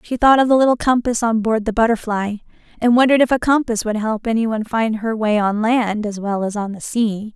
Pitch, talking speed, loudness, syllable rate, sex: 225 Hz, 235 wpm, -17 LUFS, 5.6 syllables/s, female